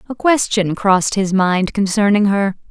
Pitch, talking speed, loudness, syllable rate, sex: 200 Hz, 155 wpm, -15 LUFS, 4.6 syllables/s, female